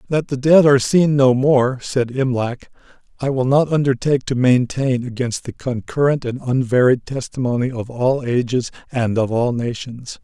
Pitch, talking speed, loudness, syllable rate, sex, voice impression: 130 Hz, 165 wpm, -18 LUFS, 4.8 syllables/s, male, masculine, adult-like, slightly thin, relaxed, soft, raspy, intellectual, friendly, reassuring, kind, modest